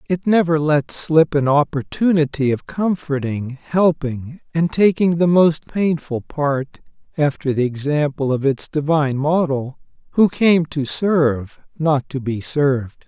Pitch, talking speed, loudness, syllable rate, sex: 150 Hz, 140 wpm, -18 LUFS, 4.1 syllables/s, male